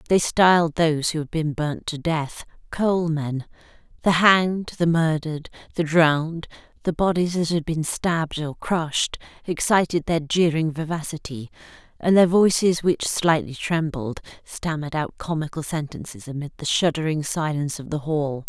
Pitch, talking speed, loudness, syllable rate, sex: 160 Hz, 145 wpm, -22 LUFS, 4.9 syllables/s, female